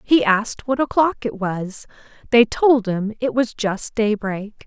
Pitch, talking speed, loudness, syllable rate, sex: 225 Hz, 165 wpm, -19 LUFS, 4.0 syllables/s, female